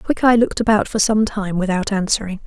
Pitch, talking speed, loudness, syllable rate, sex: 205 Hz, 195 wpm, -17 LUFS, 5.9 syllables/s, female